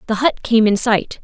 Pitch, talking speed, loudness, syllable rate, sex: 225 Hz, 245 wpm, -16 LUFS, 4.8 syllables/s, female